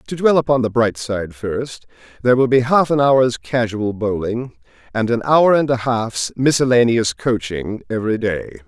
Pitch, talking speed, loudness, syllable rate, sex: 120 Hz, 175 wpm, -17 LUFS, 4.7 syllables/s, male